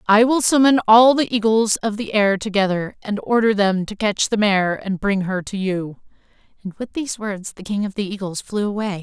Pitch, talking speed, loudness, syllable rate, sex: 210 Hz, 220 wpm, -19 LUFS, 5.0 syllables/s, female